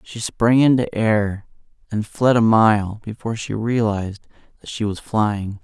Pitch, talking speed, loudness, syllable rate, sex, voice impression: 110 Hz, 160 wpm, -19 LUFS, 4.2 syllables/s, male, masculine, adult-like, tensed, powerful, clear, slightly nasal, slightly refreshing, calm, friendly, reassuring, slightly wild, slightly lively, kind, slightly modest